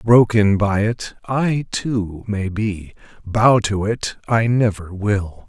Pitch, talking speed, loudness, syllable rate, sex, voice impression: 105 Hz, 140 wpm, -19 LUFS, 3.1 syllables/s, male, masculine, adult-like, clear, fluent, slightly raspy, cool, intellectual, calm, slightly friendly, reassuring, elegant, wild, slightly strict